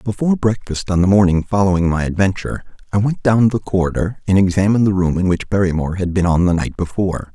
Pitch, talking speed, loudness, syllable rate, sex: 95 Hz, 210 wpm, -17 LUFS, 6.4 syllables/s, male